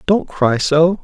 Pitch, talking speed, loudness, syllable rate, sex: 160 Hz, 175 wpm, -15 LUFS, 3.4 syllables/s, male